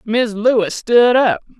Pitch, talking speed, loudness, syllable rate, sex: 225 Hz, 150 wpm, -14 LUFS, 3.6 syllables/s, female